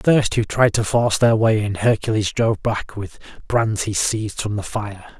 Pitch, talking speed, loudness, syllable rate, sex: 110 Hz, 220 wpm, -19 LUFS, 5.0 syllables/s, male